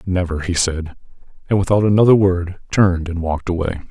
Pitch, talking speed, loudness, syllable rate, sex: 90 Hz, 170 wpm, -17 LUFS, 5.9 syllables/s, male